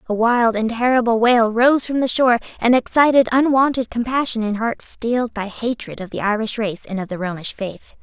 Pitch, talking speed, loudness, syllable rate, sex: 235 Hz, 200 wpm, -18 LUFS, 5.3 syllables/s, female